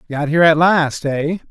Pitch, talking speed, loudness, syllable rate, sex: 155 Hz, 200 wpm, -15 LUFS, 5.1 syllables/s, male